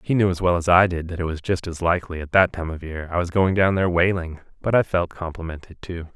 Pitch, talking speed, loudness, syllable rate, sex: 85 Hz, 285 wpm, -21 LUFS, 6.3 syllables/s, male